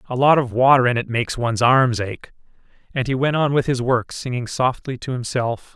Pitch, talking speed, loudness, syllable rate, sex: 125 Hz, 220 wpm, -19 LUFS, 5.5 syllables/s, male